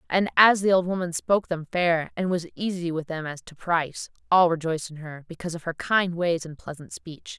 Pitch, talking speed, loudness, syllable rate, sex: 170 Hz, 225 wpm, -24 LUFS, 5.4 syllables/s, female